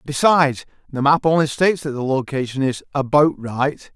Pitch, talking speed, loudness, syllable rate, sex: 140 Hz, 165 wpm, -19 LUFS, 5.2 syllables/s, male